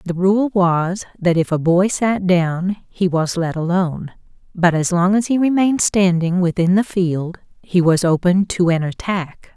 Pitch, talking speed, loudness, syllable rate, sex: 180 Hz, 180 wpm, -17 LUFS, 4.3 syllables/s, female